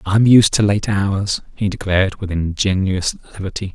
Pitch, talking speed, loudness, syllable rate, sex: 100 Hz, 175 wpm, -17 LUFS, 5.0 syllables/s, male